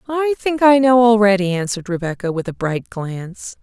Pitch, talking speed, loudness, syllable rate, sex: 210 Hz, 180 wpm, -17 LUFS, 5.3 syllables/s, female